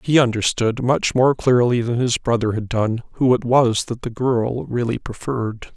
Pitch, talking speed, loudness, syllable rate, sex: 120 Hz, 190 wpm, -19 LUFS, 4.6 syllables/s, male